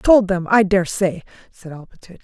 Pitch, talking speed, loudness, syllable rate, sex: 190 Hz, 190 wpm, -17 LUFS, 4.9 syllables/s, female